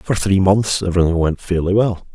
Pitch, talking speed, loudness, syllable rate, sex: 95 Hz, 195 wpm, -17 LUFS, 5.5 syllables/s, male